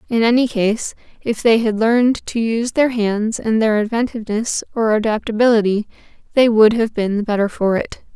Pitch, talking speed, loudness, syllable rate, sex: 225 Hz, 175 wpm, -17 LUFS, 5.3 syllables/s, female